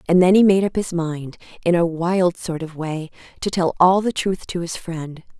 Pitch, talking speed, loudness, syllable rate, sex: 175 Hz, 235 wpm, -20 LUFS, 4.7 syllables/s, female